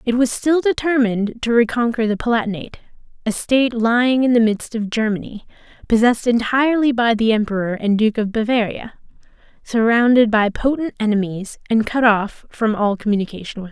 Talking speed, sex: 160 wpm, female